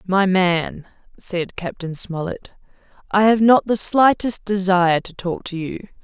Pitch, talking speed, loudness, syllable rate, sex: 190 Hz, 150 wpm, -19 LUFS, 4.1 syllables/s, female